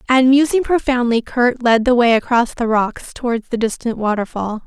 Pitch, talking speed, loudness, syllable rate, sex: 240 Hz, 180 wpm, -16 LUFS, 5.0 syllables/s, female